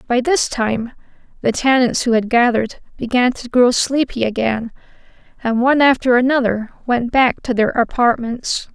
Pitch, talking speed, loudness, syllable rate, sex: 245 Hz, 150 wpm, -16 LUFS, 4.8 syllables/s, female